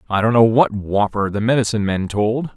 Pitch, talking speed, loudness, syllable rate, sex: 110 Hz, 210 wpm, -17 LUFS, 5.5 syllables/s, male